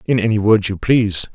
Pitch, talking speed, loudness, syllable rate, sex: 105 Hz, 225 wpm, -16 LUFS, 5.7 syllables/s, male